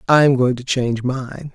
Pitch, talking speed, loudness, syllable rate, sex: 130 Hz, 235 wpm, -18 LUFS, 5.0 syllables/s, male